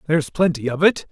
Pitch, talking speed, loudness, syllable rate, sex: 155 Hz, 215 wpm, -19 LUFS, 6.4 syllables/s, male